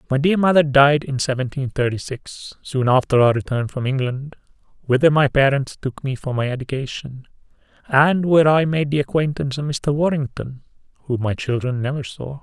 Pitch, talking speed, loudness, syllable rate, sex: 135 Hz, 175 wpm, -19 LUFS, 5.3 syllables/s, male